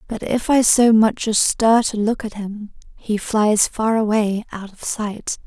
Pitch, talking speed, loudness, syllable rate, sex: 215 Hz, 200 wpm, -18 LUFS, 3.8 syllables/s, female